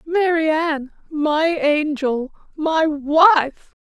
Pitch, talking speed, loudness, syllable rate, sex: 310 Hz, 95 wpm, -18 LUFS, 2.5 syllables/s, female